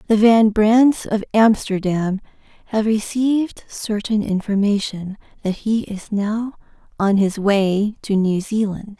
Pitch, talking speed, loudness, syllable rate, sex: 210 Hz, 125 wpm, -19 LUFS, 3.7 syllables/s, female